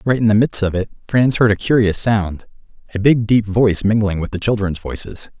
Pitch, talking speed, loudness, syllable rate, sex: 105 Hz, 220 wpm, -17 LUFS, 5.4 syllables/s, male